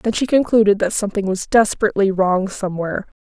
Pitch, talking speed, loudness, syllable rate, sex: 205 Hz, 165 wpm, -17 LUFS, 6.5 syllables/s, female